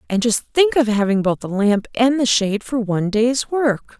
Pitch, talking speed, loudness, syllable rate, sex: 230 Hz, 225 wpm, -18 LUFS, 5.0 syllables/s, female